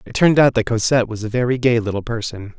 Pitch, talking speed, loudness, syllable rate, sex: 115 Hz, 255 wpm, -18 LUFS, 6.9 syllables/s, male